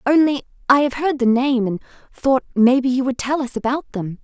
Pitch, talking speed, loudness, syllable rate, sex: 260 Hz, 210 wpm, -19 LUFS, 5.3 syllables/s, female